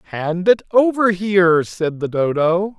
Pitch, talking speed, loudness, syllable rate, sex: 180 Hz, 150 wpm, -17 LUFS, 3.8 syllables/s, male